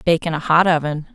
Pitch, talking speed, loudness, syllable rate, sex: 165 Hz, 260 wpm, -18 LUFS, 6.1 syllables/s, female